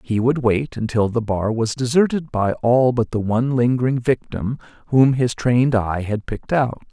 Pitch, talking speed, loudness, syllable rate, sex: 120 Hz, 190 wpm, -19 LUFS, 4.9 syllables/s, male